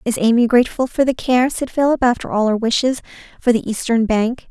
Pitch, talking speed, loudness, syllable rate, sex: 240 Hz, 215 wpm, -17 LUFS, 5.8 syllables/s, female